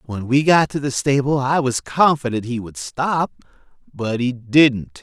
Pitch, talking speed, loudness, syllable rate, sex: 130 Hz, 180 wpm, -19 LUFS, 4.2 syllables/s, male